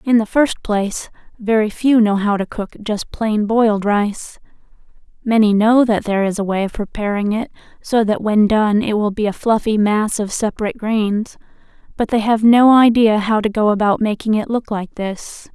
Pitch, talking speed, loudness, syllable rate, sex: 215 Hz, 195 wpm, -16 LUFS, 4.9 syllables/s, female